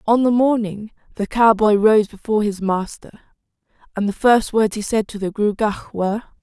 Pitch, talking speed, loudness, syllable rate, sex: 215 Hz, 180 wpm, -18 LUFS, 5.2 syllables/s, female